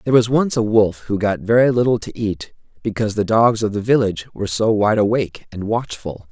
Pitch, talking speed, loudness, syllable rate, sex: 110 Hz, 220 wpm, -18 LUFS, 5.8 syllables/s, male